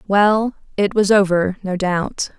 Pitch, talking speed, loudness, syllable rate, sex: 195 Hz, 150 wpm, -18 LUFS, 3.6 syllables/s, female